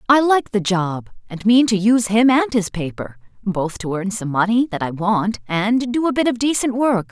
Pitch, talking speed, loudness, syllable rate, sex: 215 Hz, 230 wpm, -18 LUFS, 4.9 syllables/s, female